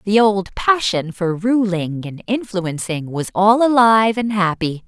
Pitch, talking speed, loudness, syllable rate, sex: 200 Hz, 150 wpm, -17 LUFS, 4.1 syllables/s, female